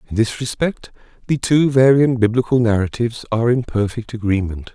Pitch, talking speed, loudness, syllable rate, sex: 120 Hz, 150 wpm, -18 LUFS, 5.6 syllables/s, male